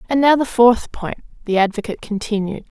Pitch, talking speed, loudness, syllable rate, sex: 225 Hz, 170 wpm, -18 LUFS, 5.7 syllables/s, female